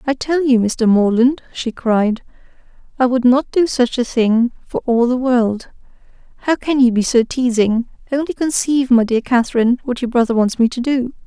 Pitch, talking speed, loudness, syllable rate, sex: 245 Hz, 190 wpm, -16 LUFS, 5.0 syllables/s, female